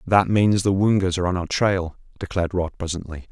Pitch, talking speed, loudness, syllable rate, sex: 90 Hz, 200 wpm, -21 LUFS, 5.8 syllables/s, male